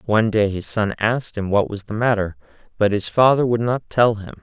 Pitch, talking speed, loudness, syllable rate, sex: 110 Hz, 230 wpm, -19 LUFS, 5.5 syllables/s, male